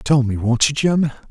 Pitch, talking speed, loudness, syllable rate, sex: 135 Hz, 230 wpm, -17 LUFS, 4.6 syllables/s, male